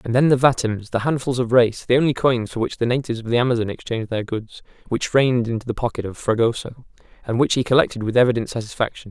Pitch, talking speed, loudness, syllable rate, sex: 120 Hz, 215 wpm, -20 LUFS, 6.7 syllables/s, male